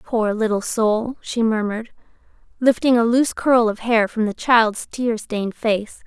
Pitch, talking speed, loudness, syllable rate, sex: 225 Hz, 170 wpm, -19 LUFS, 4.4 syllables/s, female